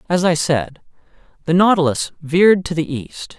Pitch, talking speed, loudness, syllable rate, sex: 165 Hz, 160 wpm, -17 LUFS, 4.8 syllables/s, male